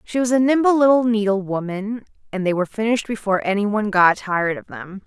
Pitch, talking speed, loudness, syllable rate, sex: 210 Hz, 190 wpm, -19 LUFS, 6.2 syllables/s, female